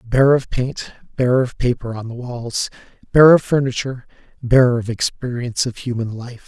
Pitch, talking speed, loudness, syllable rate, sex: 125 Hz, 165 wpm, -18 LUFS, 4.9 syllables/s, male